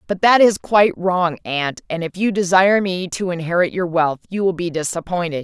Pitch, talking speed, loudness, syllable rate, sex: 180 Hz, 210 wpm, -18 LUFS, 5.3 syllables/s, female